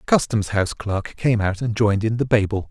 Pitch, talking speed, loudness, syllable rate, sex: 105 Hz, 245 wpm, -21 LUFS, 5.7 syllables/s, male